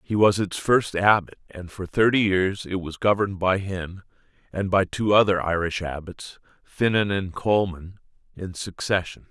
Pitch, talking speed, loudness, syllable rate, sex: 95 Hz, 160 wpm, -23 LUFS, 4.5 syllables/s, male